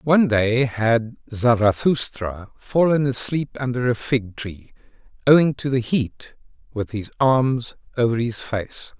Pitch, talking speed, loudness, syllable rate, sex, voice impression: 120 Hz, 135 wpm, -21 LUFS, 3.9 syllables/s, male, very masculine, middle-aged, thick, slightly relaxed, slightly powerful, bright, slightly soft, clear, fluent, slightly raspy, cool, intellectual, refreshing, very sincere, very calm, friendly, reassuring, slightly unique, elegant, slightly wild, slightly sweet, lively, kind, slightly intense, slightly modest